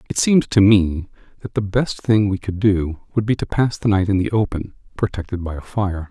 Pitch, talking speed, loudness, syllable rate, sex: 100 Hz, 235 wpm, -19 LUFS, 5.3 syllables/s, male